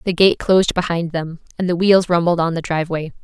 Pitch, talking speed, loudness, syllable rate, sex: 170 Hz, 225 wpm, -17 LUFS, 5.9 syllables/s, female